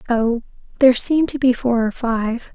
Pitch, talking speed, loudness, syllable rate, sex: 245 Hz, 165 wpm, -18 LUFS, 4.6 syllables/s, female